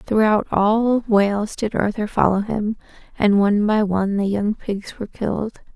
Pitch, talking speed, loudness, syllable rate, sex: 210 Hz, 165 wpm, -20 LUFS, 4.6 syllables/s, female